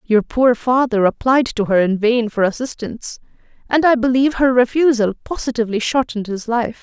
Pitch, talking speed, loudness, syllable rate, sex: 240 Hz, 165 wpm, -17 LUFS, 5.5 syllables/s, female